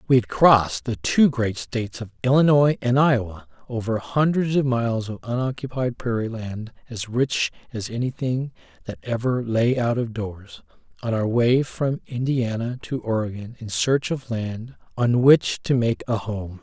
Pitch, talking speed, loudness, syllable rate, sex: 120 Hz, 165 wpm, -22 LUFS, 4.6 syllables/s, male